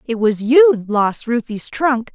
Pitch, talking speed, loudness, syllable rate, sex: 240 Hz, 170 wpm, -16 LUFS, 3.5 syllables/s, female